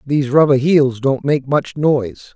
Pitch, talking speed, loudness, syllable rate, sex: 140 Hz, 180 wpm, -15 LUFS, 4.6 syllables/s, male